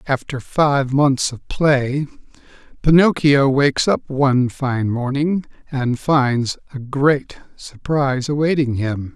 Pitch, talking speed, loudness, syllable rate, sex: 135 Hz, 120 wpm, -18 LUFS, 3.6 syllables/s, male